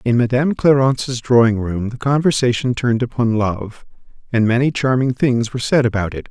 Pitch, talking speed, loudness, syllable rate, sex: 120 Hz, 170 wpm, -17 LUFS, 5.6 syllables/s, male